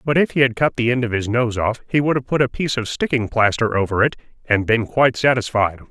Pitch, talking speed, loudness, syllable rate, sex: 120 Hz, 265 wpm, -19 LUFS, 6.2 syllables/s, male